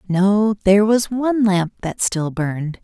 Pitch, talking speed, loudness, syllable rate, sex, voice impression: 200 Hz, 170 wpm, -18 LUFS, 4.5 syllables/s, female, feminine, adult-like, tensed, powerful, bright, clear, slightly fluent, intellectual, slightly friendly, elegant, lively, slightly sharp